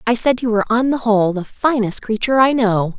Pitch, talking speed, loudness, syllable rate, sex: 230 Hz, 240 wpm, -16 LUFS, 6.1 syllables/s, female